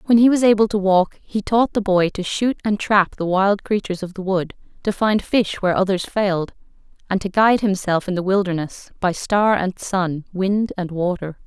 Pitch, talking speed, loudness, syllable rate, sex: 195 Hz, 210 wpm, -19 LUFS, 5.0 syllables/s, female